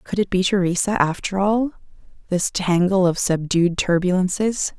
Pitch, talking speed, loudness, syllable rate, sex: 185 Hz, 140 wpm, -20 LUFS, 4.7 syllables/s, female